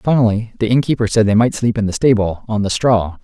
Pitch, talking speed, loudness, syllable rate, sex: 110 Hz, 240 wpm, -16 LUFS, 5.9 syllables/s, male